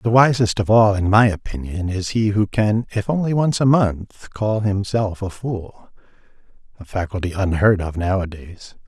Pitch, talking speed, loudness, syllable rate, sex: 100 Hz, 160 wpm, -19 LUFS, 4.5 syllables/s, male